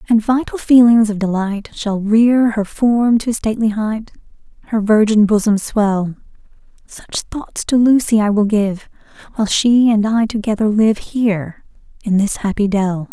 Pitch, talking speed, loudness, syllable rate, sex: 215 Hz, 155 wpm, -15 LUFS, 4.4 syllables/s, female